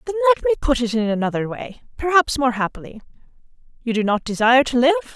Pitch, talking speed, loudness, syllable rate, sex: 260 Hz, 185 wpm, -19 LUFS, 6.7 syllables/s, female